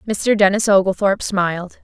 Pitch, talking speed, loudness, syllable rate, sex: 195 Hz, 130 wpm, -16 LUFS, 5.6 syllables/s, female